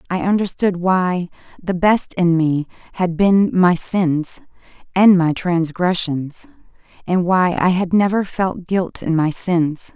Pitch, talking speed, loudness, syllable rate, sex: 180 Hz, 145 wpm, -17 LUFS, 3.6 syllables/s, female